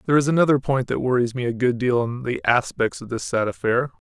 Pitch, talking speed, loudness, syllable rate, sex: 125 Hz, 250 wpm, -22 LUFS, 6.1 syllables/s, male